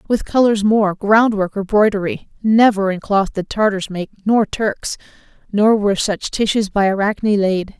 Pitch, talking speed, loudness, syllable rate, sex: 205 Hz, 160 wpm, -17 LUFS, 4.5 syllables/s, female